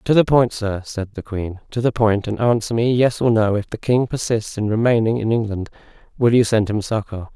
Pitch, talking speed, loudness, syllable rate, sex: 110 Hz, 235 wpm, -19 LUFS, 5.3 syllables/s, male